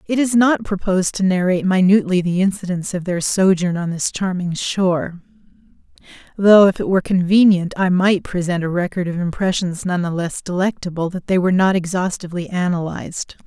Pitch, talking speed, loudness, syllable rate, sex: 185 Hz, 160 wpm, -18 LUFS, 5.7 syllables/s, female